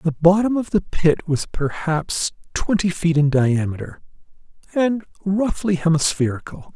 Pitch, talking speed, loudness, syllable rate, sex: 170 Hz, 125 wpm, -20 LUFS, 4.3 syllables/s, male